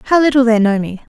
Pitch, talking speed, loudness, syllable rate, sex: 235 Hz, 260 wpm, -13 LUFS, 7.0 syllables/s, female